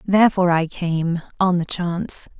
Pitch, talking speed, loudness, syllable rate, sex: 180 Hz, 125 wpm, -20 LUFS, 4.9 syllables/s, female